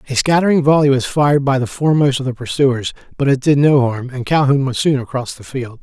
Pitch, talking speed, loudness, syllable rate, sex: 135 Hz, 235 wpm, -15 LUFS, 6.0 syllables/s, male